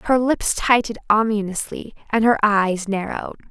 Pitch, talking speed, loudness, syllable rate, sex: 215 Hz, 135 wpm, -20 LUFS, 5.0 syllables/s, female